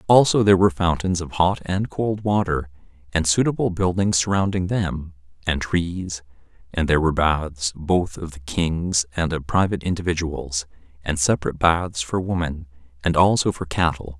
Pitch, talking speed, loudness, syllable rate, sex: 85 Hz, 155 wpm, -21 LUFS, 5.0 syllables/s, male